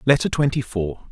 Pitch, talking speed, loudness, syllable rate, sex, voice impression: 120 Hz, 160 wpm, -21 LUFS, 5.2 syllables/s, male, very masculine, adult-like, slightly thick, very tensed, powerful, very bright, hard, very clear, very fluent, slightly raspy, slightly cool, intellectual, very refreshing, slightly sincere, slightly calm, slightly mature, slightly friendly, slightly reassuring, very unique, slightly elegant, wild, slightly sweet, very lively, slightly strict, intense, slightly sharp